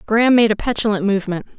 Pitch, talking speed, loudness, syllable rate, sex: 215 Hz, 190 wpm, -17 LUFS, 7.2 syllables/s, female